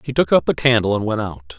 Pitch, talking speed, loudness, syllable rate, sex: 105 Hz, 300 wpm, -18 LUFS, 6.0 syllables/s, male